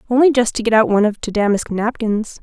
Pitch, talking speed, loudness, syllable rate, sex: 225 Hz, 245 wpm, -16 LUFS, 6.3 syllables/s, female